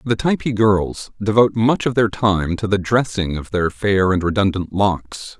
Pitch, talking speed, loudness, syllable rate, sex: 105 Hz, 190 wpm, -18 LUFS, 4.5 syllables/s, male